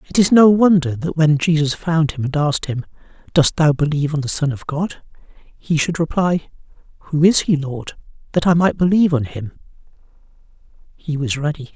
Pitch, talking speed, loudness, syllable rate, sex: 155 Hz, 185 wpm, -17 LUFS, 5.4 syllables/s, male